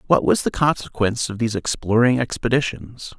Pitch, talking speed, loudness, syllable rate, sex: 115 Hz, 150 wpm, -20 LUFS, 5.7 syllables/s, male